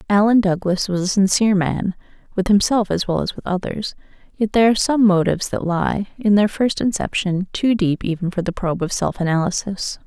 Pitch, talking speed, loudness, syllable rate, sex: 195 Hz, 195 wpm, -19 LUFS, 5.6 syllables/s, female